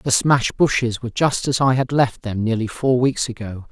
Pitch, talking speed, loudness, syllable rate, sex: 120 Hz, 225 wpm, -19 LUFS, 5.2 syllables/s, male